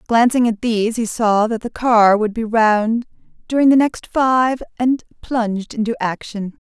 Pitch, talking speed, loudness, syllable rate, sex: 230 Hz, 170 wpm, -17 LUFS, 4.4 syllables/s, female